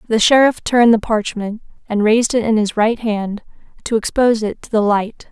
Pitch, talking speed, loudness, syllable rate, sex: 220 Hz, 205 wpm, -16 LUFS, 5.4 syllables/s, female